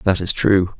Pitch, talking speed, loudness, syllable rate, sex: 90 Hz, 225 wpm, -17 LUFS, 4.7 syllables/s, male